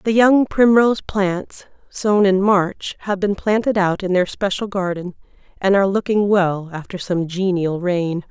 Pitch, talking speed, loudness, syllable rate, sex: 195 Hz, 165 wpm, -18 LUFS, 4.3 syllables/s, female